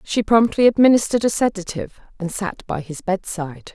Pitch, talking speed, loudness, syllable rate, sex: 195 Hz, 160 wpm, -19 LUFS, 5.8 syllables/s, female